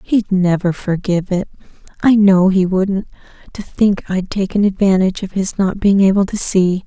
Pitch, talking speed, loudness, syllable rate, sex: 190 Hz, 155 wpm, -15 LUFS, 4.9 syllables/s, female